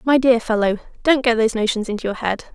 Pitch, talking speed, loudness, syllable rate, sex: 235 Hz, 235 wpm, -19 LUFS, 6.3 syllables/s, female